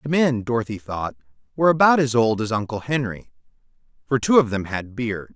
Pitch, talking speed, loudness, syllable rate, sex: 120 Hz, 190 wpm, -21 LUFS, 5.5 syllables/s, male